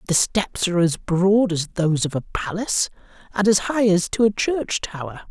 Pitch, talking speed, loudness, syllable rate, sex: 190 Hz, 205 wpm, -21 LUFS, 5.1 syllables/s, male